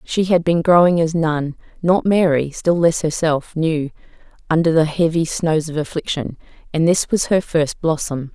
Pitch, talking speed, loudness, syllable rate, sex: 160 Hz, 175 wpm, -18 LUFS, 4.5 syllables/s, female